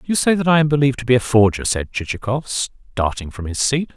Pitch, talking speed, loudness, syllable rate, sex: 125 Hz, 240 wpm, -18 LUFS, 5.7 syllables/s, male